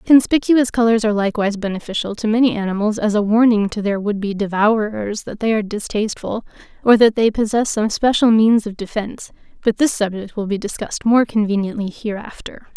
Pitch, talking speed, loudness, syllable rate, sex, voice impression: 215 Hz, 180 wpm, -18 LUFS, 5.9 syllables/s, female, very feminine, slightly young, slightly adult-like, very thin, tensed, slightly powerful, very bright, very hard, very clear, very fluent, cute, very intellectual, refreshing, sincere, very calm, very friendly, very reassuring, unique, elegant, slightly wild, very sweet, intense, slightly sharp